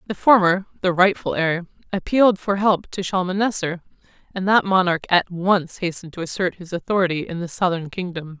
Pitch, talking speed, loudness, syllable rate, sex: 185 Hz, 170 wpm, -20 LUFS, 5.5 syllables/s, female